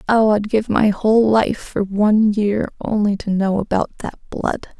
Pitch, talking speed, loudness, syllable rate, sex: 210 Hz, 190 wpm, -18 LUFS, 4.4 syllables/s, female